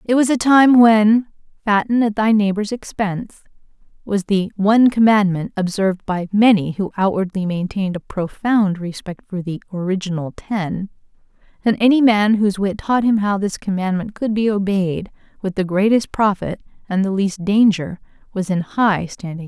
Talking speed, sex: 170 wpm, female